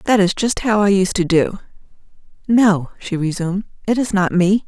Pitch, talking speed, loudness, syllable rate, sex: 195 Hz, 180 wpm, -17 LUFS, 5.1 syllables/s, female